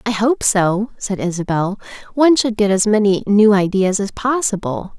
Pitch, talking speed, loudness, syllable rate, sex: 205 Hz, 170 wpm, -16 LUFS, 4.8 syllables/s, female